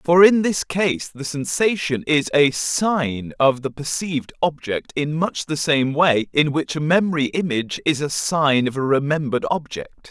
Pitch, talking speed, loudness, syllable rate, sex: 150 Hz, 180 wpm, -20 LUFS, 4.5 syllables/s, male